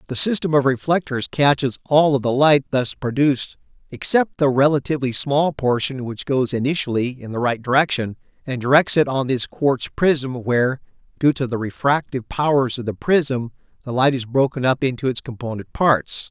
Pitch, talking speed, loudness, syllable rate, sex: 135 Hz, 175 wpm, -19 LUFS, 5.1 syllables/s, male